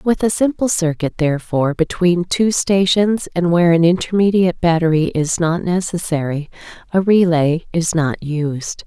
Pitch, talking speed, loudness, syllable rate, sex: 175 Hz, 140 wpm, -16 LUFS, 4.7 syllables/s, female